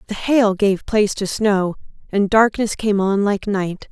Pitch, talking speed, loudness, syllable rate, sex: 205 Hz, 185 wpm, -18 LUFS, 4.1 syllables/s, female